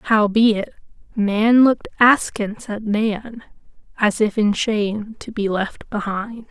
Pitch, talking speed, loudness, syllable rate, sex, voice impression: 215 Hz, 130 wpm, -19 LUFS, 3.8 syllables/s, female, gender-neutral, slightly young, tensed, slightly bright, soft, friendly, reassuring, lively